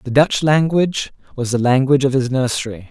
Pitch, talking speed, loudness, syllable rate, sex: 135 Hz, 185 wpm, -17 LUFS, 5.8 syllables/s, male